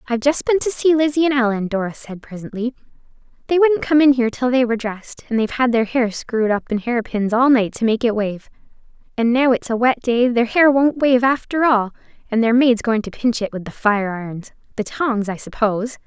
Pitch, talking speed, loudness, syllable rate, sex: 240 Hz, 230 wpm, -18 LUFS, 5.8 syllables/s, female